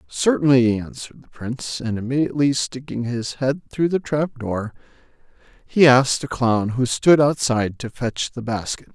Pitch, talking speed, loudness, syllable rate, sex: 125 Hz, 155 wpm, -20 LUFS, 4.9 syllables/s, male